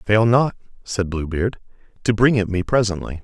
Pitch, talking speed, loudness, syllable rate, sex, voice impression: 105 Hz, 185 wpm, -20 LUFS, 4.8 syllables/s, male, very masculine, very thick, tensed, very powerful, slightly bright, soft, muffled, very fluent, very cool, intellectual, slightly refreshing, sincere, very calm, friendly, reassuring, very unique, elegant, wild, slightly sweet, lively, very kind, slightly intense